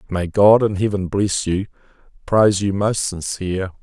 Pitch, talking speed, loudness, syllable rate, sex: 100 Hz, 155 wpm, -18 LUFS, 4.4 syllables/s, male